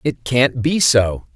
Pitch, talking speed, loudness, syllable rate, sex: 130 Hz, 175 wpm, -16 LUFS, 3.3 syllables/s, male